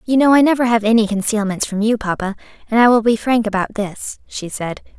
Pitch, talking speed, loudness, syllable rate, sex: 220 Hz, 230 wpm, -17 LUFS, 5.9 syllables/s, female